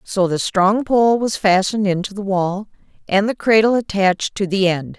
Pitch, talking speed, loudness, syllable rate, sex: 200 Hz, 195 wpm, -17 LUFS, 4.9 syllables/s, female